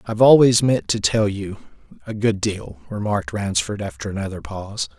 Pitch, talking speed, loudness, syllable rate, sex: 105 Hz, 155 wpm, -20 LUFS, 5.5 syllables/s, male